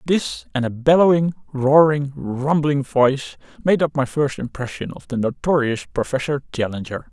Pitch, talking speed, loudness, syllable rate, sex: 135 Hz, 145 wpm, -20 LUFS, 4.8 syllables/s, male